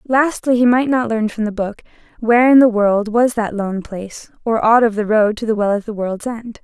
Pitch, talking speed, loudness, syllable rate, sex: 225 Hz, 255 wpm, -16 LUFS, 5.2 syllables/s, female